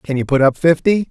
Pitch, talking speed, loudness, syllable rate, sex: 155 Hz, 270 wpm, -15 LUFS, 5.6 syllables/s, male